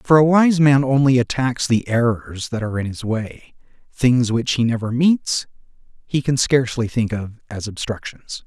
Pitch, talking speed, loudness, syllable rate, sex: 125 Hz, 175 wpm, -19 LUFS, 4.6 syllables/s, male